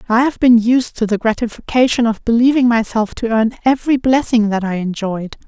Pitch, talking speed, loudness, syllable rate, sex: 230 Hz, 185 wpm, -15 LUFS, 5.5 syllables/s, female